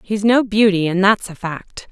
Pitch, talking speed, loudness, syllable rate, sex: 200 Hz, 220 wpm, -16 LUFS, 4.4 syllables/s, female